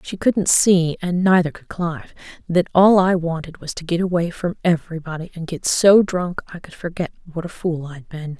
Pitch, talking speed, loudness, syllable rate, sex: 170 Hz, 205 wpm, -19 LUFS, 5.2 syllables/s, female